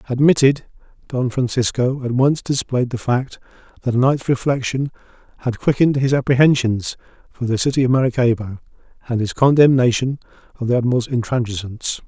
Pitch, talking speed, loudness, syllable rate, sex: 125 Hz, 140 wpm, -18 LUFS, 5.7 syllables/s, male